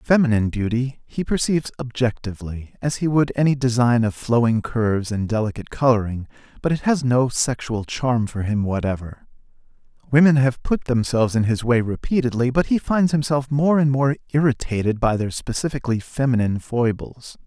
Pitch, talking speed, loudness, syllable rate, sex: 125 Hz, 160 wpm, -21 LUFS, 5.4 syllables/s, male